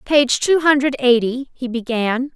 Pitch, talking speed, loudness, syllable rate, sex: 260 Hz, 155 wpm, -17 LUFS, 4.1 syllables/s, female